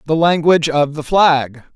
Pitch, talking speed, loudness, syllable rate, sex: 155 Hz, 170 wpm, -14 LUFS, 4.7 syllables/s, male